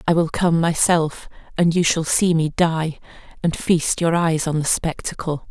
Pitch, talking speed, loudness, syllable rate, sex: 165 Hz, 185 wpm, -19 LUFS, 4.3 syllables/s, female